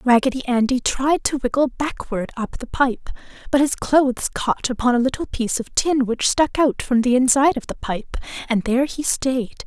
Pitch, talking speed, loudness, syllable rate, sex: 255 Hz, 200 wpm, -20 LUFS, 5.1 syllables/s, female